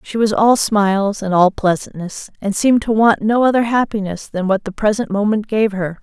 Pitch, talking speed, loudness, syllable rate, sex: 210 Hz, 210 wpm, -16 LUFS, 5.1 syllables/s, female